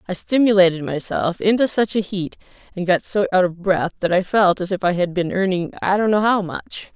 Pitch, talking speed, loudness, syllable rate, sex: 190 Hz, 235 wpm, -19 LUFS, 5.3 syllables/s, female